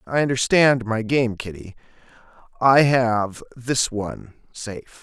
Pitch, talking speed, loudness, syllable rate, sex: 120 Hz, 120 wpm, -20 LUFS, 4.0 syllables/s, male